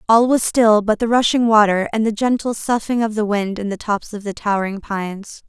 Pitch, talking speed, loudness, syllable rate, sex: 215 Hz, 230 wpm, -18 LUFS, 5.4 syllables/s, female